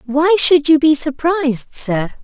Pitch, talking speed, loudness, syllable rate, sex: 295 Hz, 160 wpm, -14 LUFS, 3.9 syllables/s, female